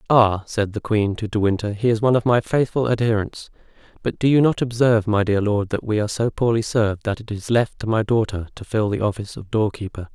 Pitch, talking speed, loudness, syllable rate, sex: 110 Hz, 245 wpm, -21 LUFS, 6.0 syllables/s, male